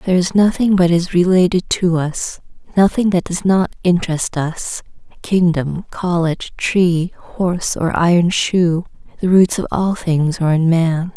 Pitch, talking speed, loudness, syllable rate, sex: 175 Hz, 145 wpm, -16 LUFS, 4.4 syllables/s, female